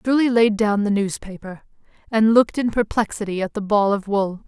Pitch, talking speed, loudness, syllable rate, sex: 210 Hz, 190 wpm, -20 LUFS, 5.4 syllables/s, female